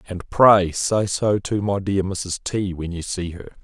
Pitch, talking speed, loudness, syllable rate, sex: 95 Hz, 215 wpm, -21 LUFS, 3.9 syllables/s, male